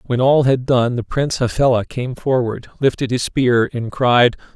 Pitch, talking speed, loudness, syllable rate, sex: 125 Hz, 185 wpm, -17 LUFS, 4.6 syllables/s, male